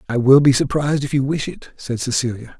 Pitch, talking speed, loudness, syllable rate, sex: 135 Hz, 230 wpm, -18 LUFS, 5.9 syllables/s, male